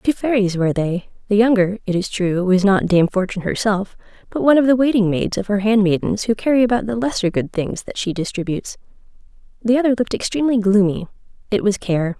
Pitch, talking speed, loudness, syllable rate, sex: 210 Hz, 195 wpm, -18 LUFS, 6.1 syllables/s, female